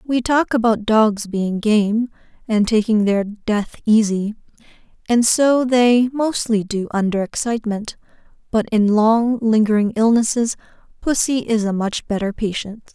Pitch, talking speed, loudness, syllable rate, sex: 220 Hz, 135 wpm, -18 LUFS, 4.2 syllables/s, female